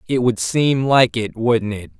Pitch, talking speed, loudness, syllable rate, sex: 120 Hz, 210 wpm, -18 LUFS, 3.9 syllables/s, male